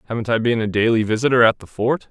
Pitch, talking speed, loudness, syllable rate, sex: 115 Hz, 255 wpm, -18 LUFS, 6.8 syllables/s, male